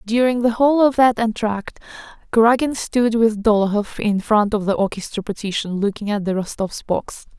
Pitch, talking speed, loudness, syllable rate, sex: 220 Hz, 170 wpm, -19 LUFS, 5.3 syllables/s, female